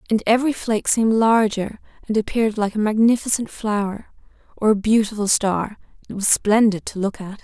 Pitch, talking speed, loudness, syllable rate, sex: 215 Hz, 160 wpm, -19 LUFS, 5.5 syllables/s, female